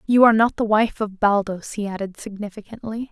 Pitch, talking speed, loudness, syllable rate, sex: 210 Hz, 195 wpm, -20 LUFS, 5.8 syllables/s, female